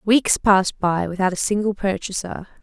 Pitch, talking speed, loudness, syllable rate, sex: 195 Hz, 160 wpm, -20 LUFS, 4.9 syllables/s, female